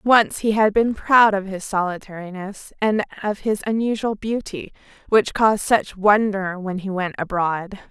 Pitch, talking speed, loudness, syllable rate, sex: 205 Hz, 160 wpm, -20 LUFS, 4.4 syllables/s, female